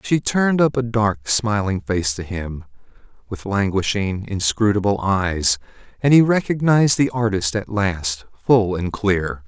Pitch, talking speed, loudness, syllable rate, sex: 105 Hz, 145 wpm, -19 LUFS, 4.2 syllables/s, male